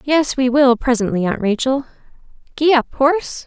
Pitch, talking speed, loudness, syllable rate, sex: 260 Hz, 155 wpm, -16 LUFS, 4.9 syllables/s, female